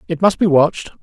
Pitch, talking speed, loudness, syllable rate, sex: 170 Hz, 235 wpm, -15 LUFS, 6.5 syllables/s, male